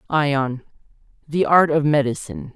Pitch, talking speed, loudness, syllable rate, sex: 150 Hz, 120 wpm, -19 LUFS, 4.6 syllables/s, male